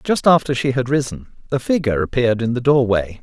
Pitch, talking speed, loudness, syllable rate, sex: 125 Hz, 205 wpm, -18 LUFS, 6.2 syllables/s, male